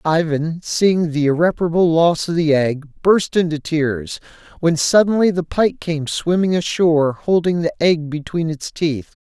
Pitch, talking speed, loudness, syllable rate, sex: 165 Hz, 155 wpm, -17 LUFS, 4.4 syllables/s, male